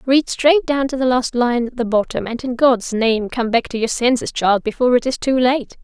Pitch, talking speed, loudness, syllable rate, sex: 245 Hz, 255 wpm, -17 LUFS, 5.2 syllables/s, female